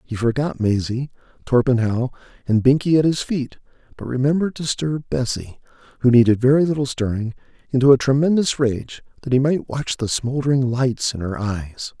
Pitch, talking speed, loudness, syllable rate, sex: 130 Hz, 165 wpm, -20 LUFS, 5.2 syllables/s, male